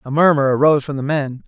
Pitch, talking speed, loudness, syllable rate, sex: 140 Hz, 245 wpm, -16 LUFS, 6.6 syllables/s, male